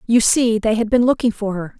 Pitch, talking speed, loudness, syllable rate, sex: 225 Hz, 270 wpm, -17 LUFS, 5.5 syllables/s, female